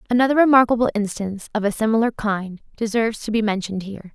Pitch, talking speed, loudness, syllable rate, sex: 220 Hz, 175 wpm, -20 LUFS, 7.0 syllables/s, female